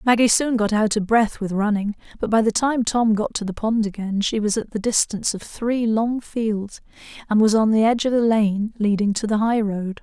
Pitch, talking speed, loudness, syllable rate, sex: 215 Hz, 235 wpm, -20 LUFS, 5.1 syllables/s, female